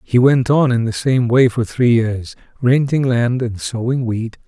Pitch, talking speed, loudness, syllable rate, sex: 120 Hz, 200 wpm, -16 LUFS, 4.2 syllables/s, male